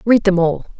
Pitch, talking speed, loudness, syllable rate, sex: 195 Hz, 230 wpm, -16 LUFS, 5.3 syllables/s, female